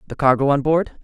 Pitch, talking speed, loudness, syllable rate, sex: 145 Hz, 230 wpm, -18 LUFS, 6.3 syllables/s, male